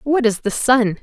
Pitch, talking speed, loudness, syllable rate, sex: 235 Hz, 235 wpm, -17 LUFS, 4.4 syllables/s, female